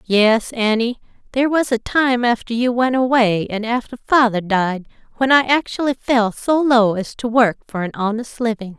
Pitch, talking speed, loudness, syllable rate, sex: 235 Hz, 185 wpm, -17 LUFS, 4.7 syllables/s, female